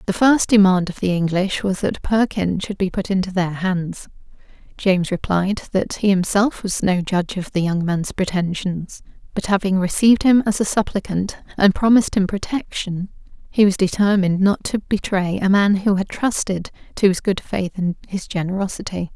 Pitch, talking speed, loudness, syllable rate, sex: 190 Hz, 180 wpm, -19 LUFS, 5.0 syllables/s, female